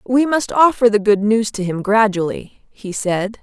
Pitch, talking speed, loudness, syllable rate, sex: 215 Hz, 195 wpm, -16 LUFS, 4.3 syllables/s, female